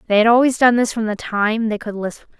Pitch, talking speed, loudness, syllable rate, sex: 220 Hz, 275 wpm, -17 LUFS, 5.9 syllables/s, female